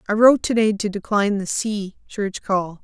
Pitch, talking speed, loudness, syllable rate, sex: 205 Hz, 190 wpm, -20 LUFS, 5.2 syllables/s, female